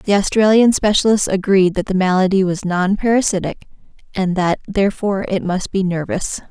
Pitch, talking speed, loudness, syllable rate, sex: 195 Hz, 155 wpm, -16 LUFS, 5.3 syllables/s, female